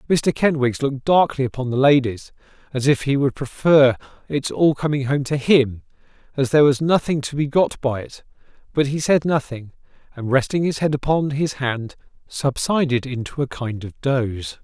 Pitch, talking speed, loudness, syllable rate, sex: 135 Hz, 180 wpm, -20 LUFS, 5.0 syllables/s, male